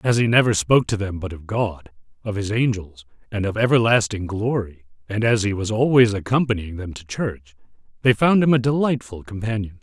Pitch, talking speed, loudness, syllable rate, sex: 110 Hz, 190 wpm, -20 LUFS, 5.5 syllables/s, male